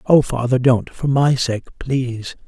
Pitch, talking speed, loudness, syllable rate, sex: 130 Hz, 170 wpm, -18 LUFS, 4.0 syllables/s, male